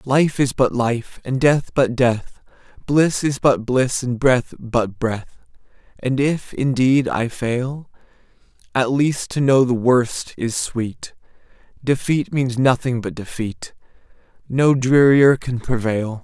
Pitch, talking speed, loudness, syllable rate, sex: 125 Hz, 140 wpm, -19 LUFS, 3.5 syllables/s, male